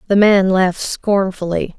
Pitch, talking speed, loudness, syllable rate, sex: 190 Hz, 135 wpm, -15 LUFS, 4.4 syllables/s, female